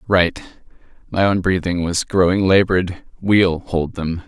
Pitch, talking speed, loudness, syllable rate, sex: 90 Hz, 140 wpm, -18 LUFS, 4.2 syllables/s, male